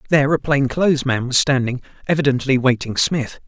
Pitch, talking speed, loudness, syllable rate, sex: 135 Hz, 175 wpm, -18 LUFS, 6.1 syllables/s, male